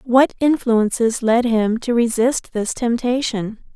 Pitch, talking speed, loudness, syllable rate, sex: 235 Hz, 130 wpm, -18 LUFS, 3.8 syllables/s, female